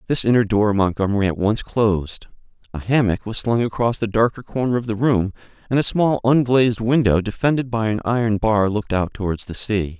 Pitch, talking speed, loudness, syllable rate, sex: 110 Hz, 200 wpm, -19 LUFS, 5.6 syllables/s, male